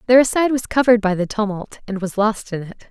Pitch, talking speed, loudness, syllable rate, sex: 215 Hz, 250 wpm, -19 LUFS, 6.5 syllables/s, female